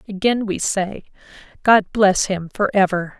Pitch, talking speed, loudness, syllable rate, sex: 195 Hz, 150 wpm, -18 LUFS, 4.2 syllables/s, female